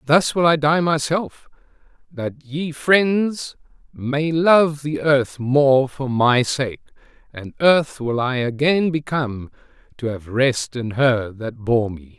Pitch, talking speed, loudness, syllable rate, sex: 135 Hz, 150 wpm, -19 LUFS, 3.4 syllables/s, male